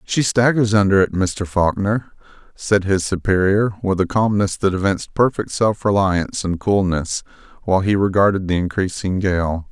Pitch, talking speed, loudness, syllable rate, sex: 95 Hz, 155 wpm, -18 LUFS, 4.8 syllables/s, male